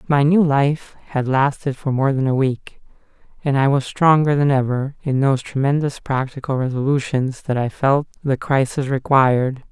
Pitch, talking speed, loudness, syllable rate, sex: 135 Hz, 165 wpm, -19 LUFS, 4.8 syllables/s, male